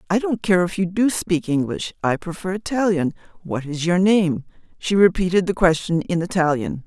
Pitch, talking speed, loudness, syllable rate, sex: 180 Hz, 175 wpm, -20 LUFS, 5.1 syllables/s, female